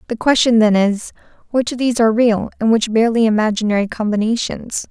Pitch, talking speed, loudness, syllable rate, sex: 225 Hz, 170 wpm, -16 LUFS, 6.2 syllables/s, female